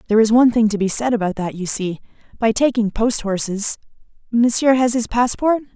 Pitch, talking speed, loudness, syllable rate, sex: 225 Hz, 190 wpm, -18 LUFS, 5.7 syllables/s, female